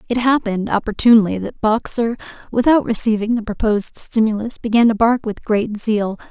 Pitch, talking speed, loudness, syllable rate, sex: 220 Hz, 150 wpm, -17 LUFS, 5.5 syllables/s, female